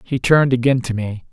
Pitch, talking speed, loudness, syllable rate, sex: 125 Hz, 225 wpm, -17 LUFS, 6.0 syllables/s, male